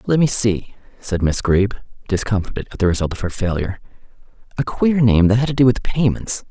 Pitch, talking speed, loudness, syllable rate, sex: 110 Hz, 205 wpm, -18 LUFS, 5.8 syllables/s, male